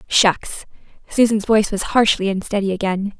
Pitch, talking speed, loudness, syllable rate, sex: 205 Hz, 130 wpm, -18 LUFS, 5.0 syllables/s, female